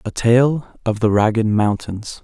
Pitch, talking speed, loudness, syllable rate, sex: 115 Hz, 160 wpm, -17 LUFS, 4.1 syllables/s, male